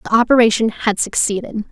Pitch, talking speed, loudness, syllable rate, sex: 220 Hz, 140 wpm, -16 LUFS, 5.8 syllables/s, female